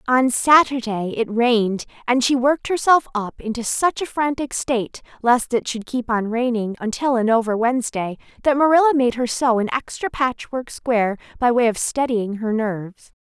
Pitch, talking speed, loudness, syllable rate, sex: 240 Hz, 175 wpm, -20 LUFS, 5.0 syllables/s, female